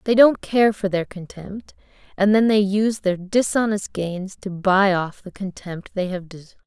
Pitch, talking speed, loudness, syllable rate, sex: 195 Hz, 190 wpm, -20 LUFS, 4.7 syllables/s, female